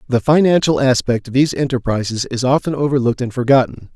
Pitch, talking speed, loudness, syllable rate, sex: 130 Hz, 165 wpm, -16 LUFS, 6.4 syllables/s, male